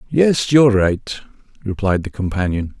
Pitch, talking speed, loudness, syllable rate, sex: 105 Hz, 130 wpm, -17 LUFS, 4.7 syllables/s, male